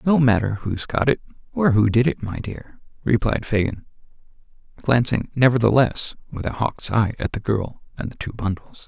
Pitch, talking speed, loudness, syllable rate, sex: 115 Hz, 175 wpm, -21 LUFS, 4.9 syllables/s, male